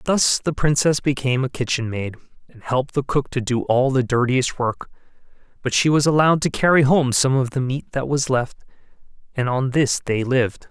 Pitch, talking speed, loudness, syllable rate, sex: 130 Hz, 200 wpm, -20 LUFS, 5.3 syllables/s, male